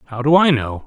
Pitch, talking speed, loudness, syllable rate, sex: 135 Hz, 275 wpm, -15 LUFS, 6.2 syllables/s, male